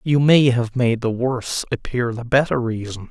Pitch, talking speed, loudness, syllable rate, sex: 120 Hz, 195 wpm, -19 LUFS, 4.8 syllables/s, male